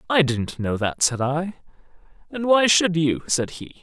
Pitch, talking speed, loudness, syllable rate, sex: 155 Hz, 190 wpm, -21 LUFS, 4.4 syllables/s, male